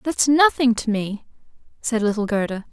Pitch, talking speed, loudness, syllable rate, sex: 235 Hz, 155 wpm, -20 LUFS, 4.9 syllables/s, female